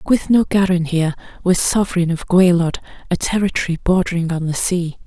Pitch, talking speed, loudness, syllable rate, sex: 175 Hz, 140 wpm, -17 LUFS, 5.5 syllables/s, female